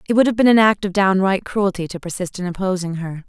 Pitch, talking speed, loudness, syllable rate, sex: 190 Hz, 255 wpm, -18 LUFS, 6.2 syllables/s, female